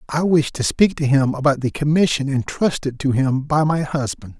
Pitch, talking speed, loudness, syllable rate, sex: 140 Hz, 205 wpm, -19 LUFS, 5.0 syllables/s, male